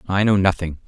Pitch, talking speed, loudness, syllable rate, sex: 95 Hz, 205 wpm, -19 LUFS, 6.2 syllables/s, male